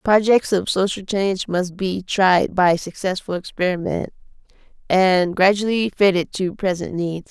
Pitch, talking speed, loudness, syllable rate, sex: 190 Hz, 130 wpm, -19 LUFS, 4.3 syllables/s, female